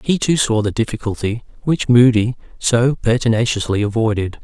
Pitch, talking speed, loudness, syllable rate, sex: 115 Hz, 135 wpm, -17 LUFS, 5.1 syllables/s, male